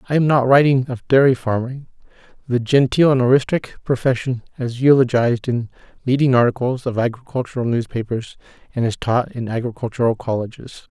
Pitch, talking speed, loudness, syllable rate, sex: 125 Hz, 140 wpm, -18 LUFS, 5.7 syllables/s, male